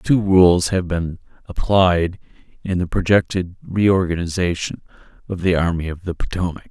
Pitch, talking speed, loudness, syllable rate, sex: 90 Hz, 135 wpm, -19 LUFS, 4.6 syllables/s, male